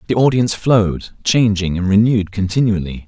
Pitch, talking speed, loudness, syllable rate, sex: 105 Hz, 135 wpm, -16 LUFS, 5.8 syllables/s, male